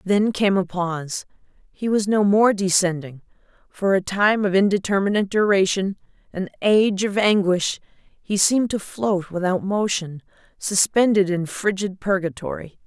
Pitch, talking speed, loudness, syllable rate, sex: 195 Hz, 135 wpm, -21 LUFS, 4.6 syllables/s, female